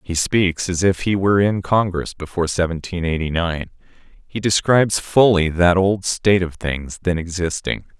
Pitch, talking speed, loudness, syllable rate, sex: 90 Hz, 165 wpm, -19 LUFS, 4.8 syllables/s, male